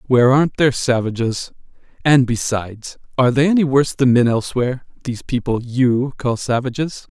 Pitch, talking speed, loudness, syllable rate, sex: 125 Hz, 150 wpm, -18 LUFS, 5.8 syllables/s, male